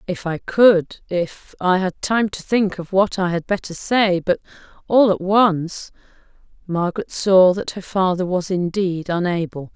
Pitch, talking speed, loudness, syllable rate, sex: 185 Hz, 160 wpm, -19 LUFS, 4.3 syllables/s, female